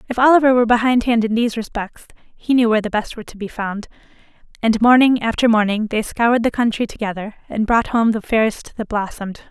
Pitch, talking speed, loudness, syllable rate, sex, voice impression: 225 Hz, 200 wpm, -17 LUFS, 6.2 syllables/s, female, feminine, adult-like, fluent, slightly unique